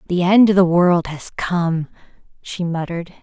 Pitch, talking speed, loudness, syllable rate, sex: 175 Hz, 165 wpm, -17 LUFS, 4.6 syllables/s, female